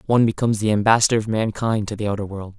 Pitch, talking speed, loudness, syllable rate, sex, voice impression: 110 Hz, 230 wpm, -20 LUFS, 7.4 syllables/s, male, very masculine, adult-like, slightly middle-aged, thick, relaxed, weak, dark, very soft, muffled, slightly halting, cool, intellectual, slightly refreshing, very sincere, calm, slightly mature, friendly, slightly reassuring, slightly unique, very elegant, very sweet, very kind, very modest